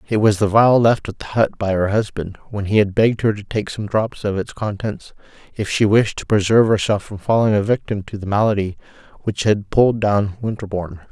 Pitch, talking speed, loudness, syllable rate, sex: 105 Hz, 220 wpm, -18 LUFS, 5.6 syllables/s, male